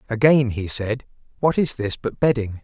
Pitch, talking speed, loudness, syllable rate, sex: 120 Hz, 180 wpm, -21 LUFS, 4.8 syllables/s, male